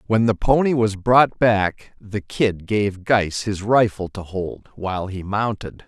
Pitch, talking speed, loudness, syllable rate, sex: 105 Hz, 175 wpm, -20 LUFS, 3.7 syllables/s, male